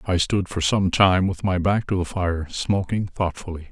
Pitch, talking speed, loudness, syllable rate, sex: 90 Hz, 210 wpm, -22 LUFS, 4.7 syllables/s, male